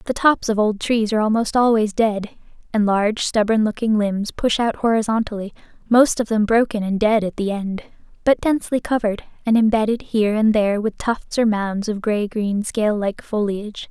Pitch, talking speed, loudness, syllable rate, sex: 215 Hz, 185 wpm, -19 LUFS, 5.3 syllables/s, female